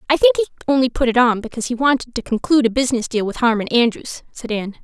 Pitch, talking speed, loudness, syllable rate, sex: 250 Hz, 250 wpm, -18 LUFS, 7.2 syllables/s, female